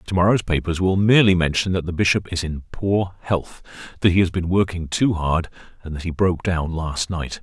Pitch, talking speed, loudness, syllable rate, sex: 90 Hz, 220 wpm, -20 LUFS, 5.4 syllables/s, male